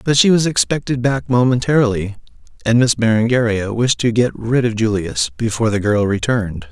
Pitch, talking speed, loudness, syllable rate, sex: 115 Hz, 170 wpm, -16 LUFS, 5.5 syllables/s, male